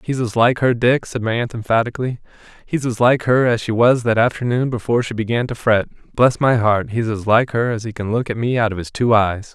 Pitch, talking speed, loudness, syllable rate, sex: 115 Hz, 250 wpm, -18 LUFS, 5.8 syllables/s, male